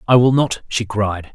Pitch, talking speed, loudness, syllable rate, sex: 110 Hz, 225 wpm, -17 LUFS, 4.4 syllables/s, male